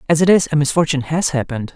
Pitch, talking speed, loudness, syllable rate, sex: 150 Hz, 240 wpm, -16 LUFS, 7.8 syllables/s, male